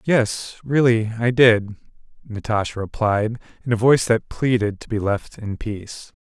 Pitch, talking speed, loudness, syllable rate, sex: 110 Hz, 155 wpm, -20 LUFS, 4.5 syllables/s, male